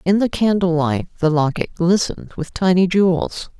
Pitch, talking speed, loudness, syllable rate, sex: 175 Hz, 165 wpm, -18 LUFS, 4.9 syllables/s, female